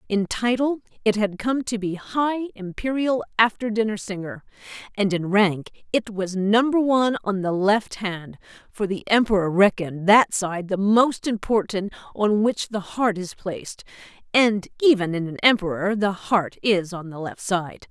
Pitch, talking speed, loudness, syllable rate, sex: 205 Hz, 170 wpm, -22 LUFS, 4.5 syllables/s, female